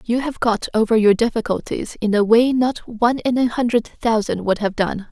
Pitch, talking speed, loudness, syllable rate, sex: 225 Hz, 210 wpm, -19 LUFS, 5.1 syllables/s, female